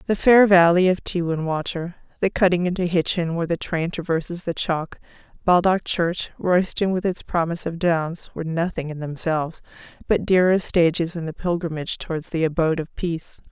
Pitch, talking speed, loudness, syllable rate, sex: 170 Hz, 180 wpm, -22 LUFS, 5.4 syllables/s, female